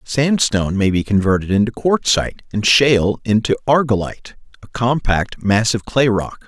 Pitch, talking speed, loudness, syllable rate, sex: 115 Hz, 140 wpm, -16 LUFS, 5.1 syllables/s, male